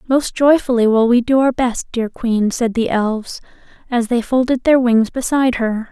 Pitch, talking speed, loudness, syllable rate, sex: 240 Hz, 195 wpm, -16 LUFS, 4.8 syllables/s, female